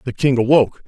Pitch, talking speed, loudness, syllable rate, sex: 125 Hz, 205 wpm, -16 LUFS, 6.8 syllables/s, male